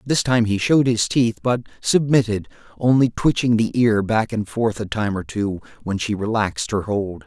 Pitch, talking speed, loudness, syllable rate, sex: 110 Hz, 200 wpm, -20 LUFS, 4.9 syllables/s, male